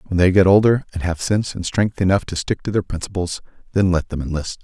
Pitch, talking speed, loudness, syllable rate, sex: 90 Hz, 245 wpm, -19 LUFS, 6.2 syllables/s, male